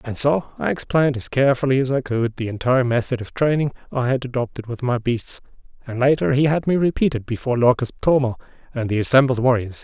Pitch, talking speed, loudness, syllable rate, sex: 125 Hz, 205 wpm, -20 LUFS, 6.3 syllables/s, male